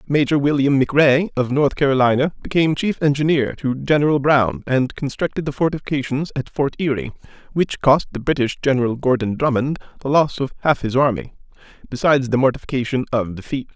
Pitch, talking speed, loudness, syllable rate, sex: 140 Hz, 160 wpm, -19 LUFS, 5.9 syllables/s, male